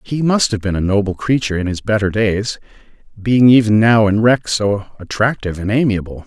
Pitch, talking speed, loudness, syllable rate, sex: 105 Hz, 190 wpm, -15 LUFS, 5.4 syllables/s, male